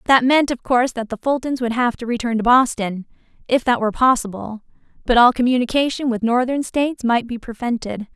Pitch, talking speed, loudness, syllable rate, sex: 240 Hz, 190 wpm, -18 LUFS, 5.8 syllables/s, female